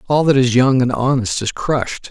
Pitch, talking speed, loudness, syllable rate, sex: 125 Hz, 230 wpm, -16 LUFS, 5.2 syllables/s, male